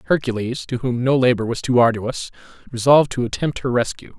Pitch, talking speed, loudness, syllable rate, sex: 125 Hz, 185 wpm, -19 LUFS, 5.9 syllables/s, male